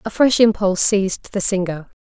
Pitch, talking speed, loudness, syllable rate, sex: 200 Hz, 180 wpm, -17 LUFS, 5.5 syllables/s, female